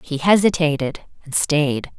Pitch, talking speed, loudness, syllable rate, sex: 155 Hz, 120 wpm, -19 LUFS, 4.4 syllables/s, female